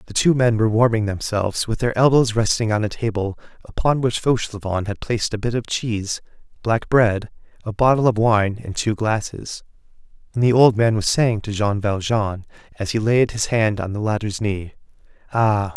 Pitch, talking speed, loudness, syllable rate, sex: 110 Hz, 190 wpm, -20 LUFS, 5.2 syllables/s, male